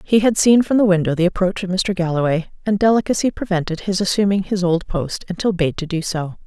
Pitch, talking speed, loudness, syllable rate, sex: 185 Hz, 225 wpm, -18 LUFS, 5.9 syllables/s, female